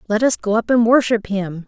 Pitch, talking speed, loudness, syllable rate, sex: 220 Hz, 250 wpm, -17 LUFS, 5.4 syllables/s, female